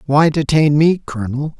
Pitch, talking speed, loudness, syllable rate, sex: 150 Hz, 150 wpm, -15 LUFS, 4.9 syllables/s, male